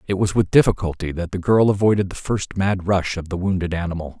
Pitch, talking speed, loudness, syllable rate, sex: 95 Hz, 230 wpm, -20 LUFS, 6.0 syllables/s, male